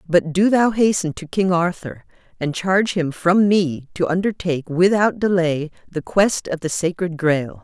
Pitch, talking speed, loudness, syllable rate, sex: 175 Hz, 175 wpm, -19 LUFS, 4.5 syllables/s, female